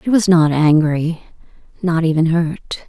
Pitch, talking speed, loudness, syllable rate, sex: 165 Hz, 145 wpm, -16 LUFS, 4.0 syllables/s, female